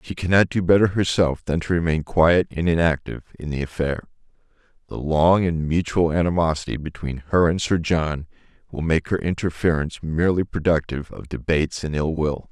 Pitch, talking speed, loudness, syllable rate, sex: 80 Hz, 170 wpm, -21 LUFS, 5.5 syllables/s, male